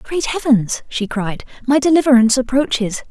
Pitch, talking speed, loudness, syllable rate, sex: 250 Hz, 135 wpm, -16 LUFS, 5.2 syllables/s, female